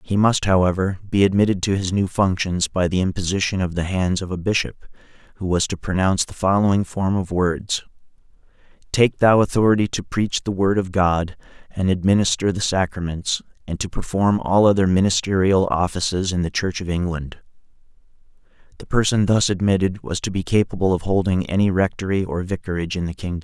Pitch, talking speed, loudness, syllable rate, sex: 95 Hz, 175 wpm, -20 LUFS, 5.6 syllables/s, male